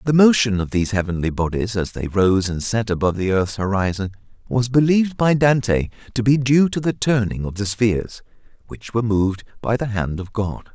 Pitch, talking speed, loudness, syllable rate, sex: 110 Hz, 200 wpm, -20 LUFS, 5.6 syllables/s, male